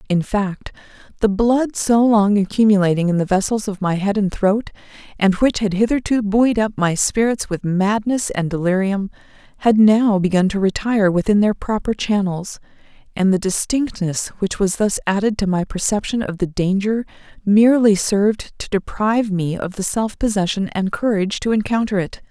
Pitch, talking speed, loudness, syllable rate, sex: 205 Hz, 170 wpm, -18 LUFS, 5.0 syllables/s, female